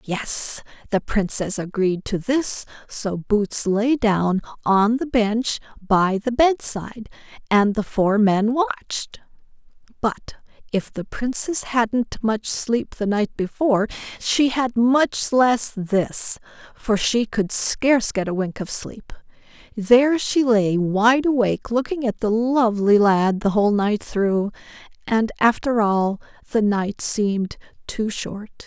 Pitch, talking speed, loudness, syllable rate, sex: 220 Hz, 140 wpm, -21 LUFS, 3.6 syllables/s, female